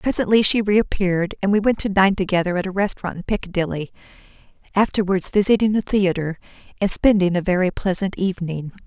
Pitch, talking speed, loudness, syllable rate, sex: 190 Hz, 160 wpm, -20 LUFS, 6.1 syllables/s, female